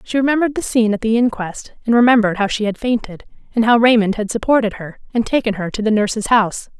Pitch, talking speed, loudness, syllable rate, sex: 225 Hz, 230 wpm, -17 LUFS, 6.7 syllables/s, female